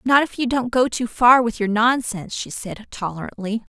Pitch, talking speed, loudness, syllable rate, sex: 230 Hz, 210 wpm, -20 LUFS, 5.1 syllables/s, female